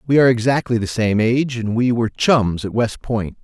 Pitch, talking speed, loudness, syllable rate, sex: 115 Hz, 225 wpm, -18 LUFS, 5.5 syllables/s, male